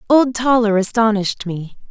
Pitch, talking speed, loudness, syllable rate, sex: 220 Hz, 125 wpm, -16 LUFS, 5.0 syllables/s, female